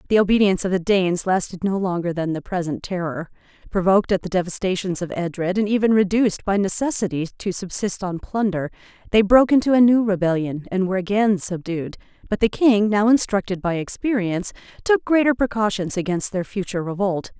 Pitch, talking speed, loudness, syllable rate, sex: 195 Hz, 175 wpm, -21 LUFS, 5.9 syllables/s, female